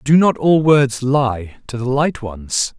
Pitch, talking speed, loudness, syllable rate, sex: 130 Hz, 195 wpm, -16 LUFS, 3.4 syllables/s, male